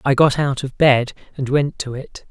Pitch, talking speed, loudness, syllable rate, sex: 135 Hz, 235 wpm, -18 LUFS, 4.6 syllables/s, male